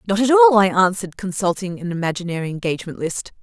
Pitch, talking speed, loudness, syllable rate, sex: 195 Hz, 175 wpm, -19 LUFS, 7.0 syllables/s, female